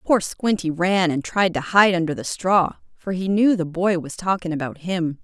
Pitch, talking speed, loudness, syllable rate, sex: 180 Hz, 220 wpm, -21 LUFS, 4.7 syllables/s, female